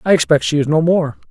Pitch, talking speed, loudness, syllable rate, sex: 140 Hz, 275 wpm, -15 LUFS, 6.4 syllables/s, male